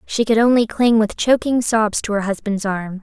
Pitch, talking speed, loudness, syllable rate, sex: 220 Hz, 220 wpm, -17 LUFS, 4.8 syllables/s, female